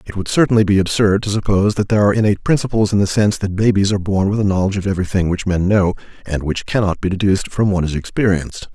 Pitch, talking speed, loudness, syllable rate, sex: 100 Hz, 245 wpm, -17 LUFS, 7.4 syllables/s, male